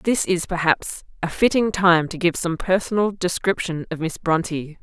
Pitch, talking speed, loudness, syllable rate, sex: 175 Hz, 175 wpm, -21 LUFS, 4.6 syllables/s, female